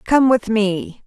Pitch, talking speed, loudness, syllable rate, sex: 220 Hz, 170 wpm, -17 LUFS, 3.2 syllables/s, female